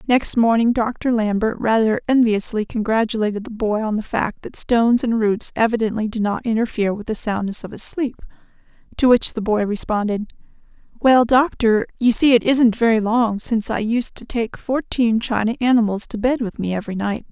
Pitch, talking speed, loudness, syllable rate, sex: 225 Hz, 185 wpm, -19 LUFS, 5.3 syllables/s, female